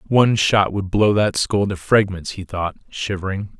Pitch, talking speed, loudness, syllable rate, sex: 100 Hz, 185 wpm, -19 LUFS, 4.7 syllables/s, male